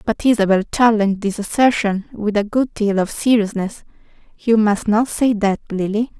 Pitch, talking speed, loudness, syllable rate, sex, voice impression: 215 Hz, 165 wpm, -18 LUFS, 4.9 syllables/s, female, feminine, slightly adult-like, calm, friendly, slightly kind